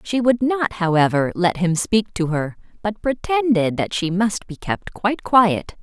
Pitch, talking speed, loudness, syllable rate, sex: 200 Hz, 185 wpm, -20 LUFS, 4.3 syllables/s, female